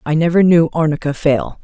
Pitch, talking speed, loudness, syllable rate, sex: 150 Hz, 185 wpm, -14 LUFS, 5.4 syllables/s, female